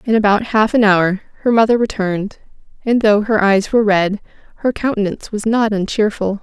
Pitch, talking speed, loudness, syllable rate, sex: 210 Hz, 175 wpm, -15 LUFS, 5.4 syllables/s, female